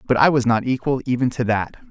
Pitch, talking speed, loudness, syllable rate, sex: 125 Hz, 250 wpm, -20 LUFS, 6.1 syllables/s, male